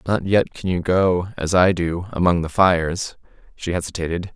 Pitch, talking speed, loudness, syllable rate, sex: 90 Hz, 165 wpm, -20 LUFS, 4.9 syllables/s, male